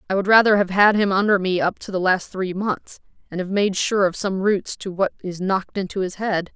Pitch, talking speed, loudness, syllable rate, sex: 190 Hz, 255 wpm, -20 LUFS, 5.4 syllables/s, female